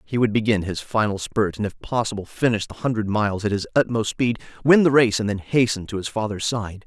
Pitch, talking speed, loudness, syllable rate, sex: 110 Hz, 235 wpm, -22 LUFS, 5.8 syllables/s, male